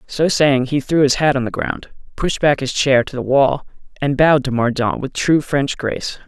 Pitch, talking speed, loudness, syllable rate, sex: 135 Hz, 230 wpm, -17 LUFS, 4.9 syllables/s, male